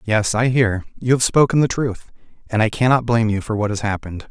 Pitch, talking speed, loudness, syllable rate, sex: 115 Hz, 235 wpm, -18 LUFS, 6.0 syllables/s, male